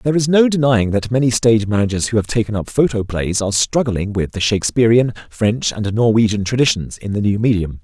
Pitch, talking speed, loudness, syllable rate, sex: 110 Hz, 200 wpm, -16 LUFS, 5.9 syllables/s, male